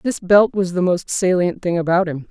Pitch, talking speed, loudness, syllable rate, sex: 180 Hz, 235 wpm, -17 LUFS, 5.0 syllables/s, female